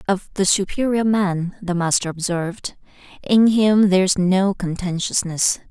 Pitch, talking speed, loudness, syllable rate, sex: 190 Hz, 135 wpm, -19 LUFS, 4.6 syllables/s, female